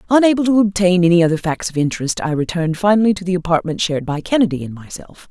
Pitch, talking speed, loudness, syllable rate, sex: 180 Hz, 215 wpm, -16 LUFS, 7.1 syllables/s, female